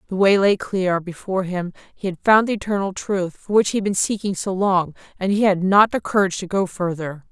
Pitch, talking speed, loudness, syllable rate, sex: 190 Hz, 240 wpm, -20 LUFS, 5.6 syllables/s, female